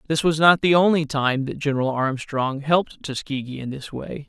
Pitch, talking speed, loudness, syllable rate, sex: 145 Hz, 195 wpm, -21 LUFS, 5.1 syllables/s, male